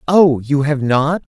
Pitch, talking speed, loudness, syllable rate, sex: 145 Hz, 180 wpm, -15 LUFS, 3.7 syllables/s, male